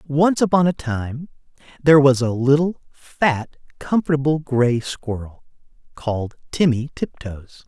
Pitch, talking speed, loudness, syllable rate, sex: 140 Hz, 115 wpm, -19 LUFS, 4.1 syllables/s, male